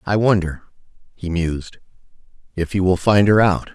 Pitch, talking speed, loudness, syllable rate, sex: 90 Hz, 160 wpm, -18 LUFS, 5.1 syllables/s, male